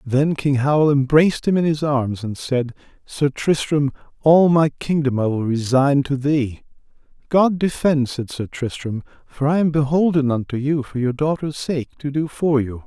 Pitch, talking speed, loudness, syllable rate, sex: 140 Hz, 180 wpm, -19 LUFS, 4.6 syllables/s, male